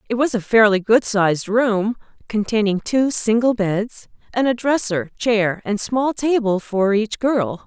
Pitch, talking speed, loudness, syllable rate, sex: 220 Hz, 165 wpm, -19 LUFS, 4.1 syllables/s, female